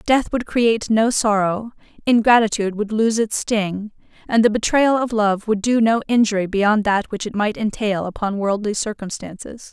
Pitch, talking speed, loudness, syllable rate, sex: 215 Hz, 175 wpm, -19 LUFS, 4.9 syllables/s, female